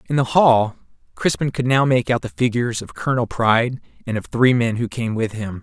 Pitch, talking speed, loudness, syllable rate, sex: 120 Hz, 225 wpm, -19 LUFS, 5.5 syllables/s, male